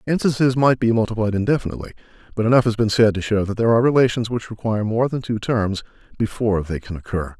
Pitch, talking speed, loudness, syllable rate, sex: 110 Hz, 210 wpm, -20 LUFS, 7.0 syllables/s, male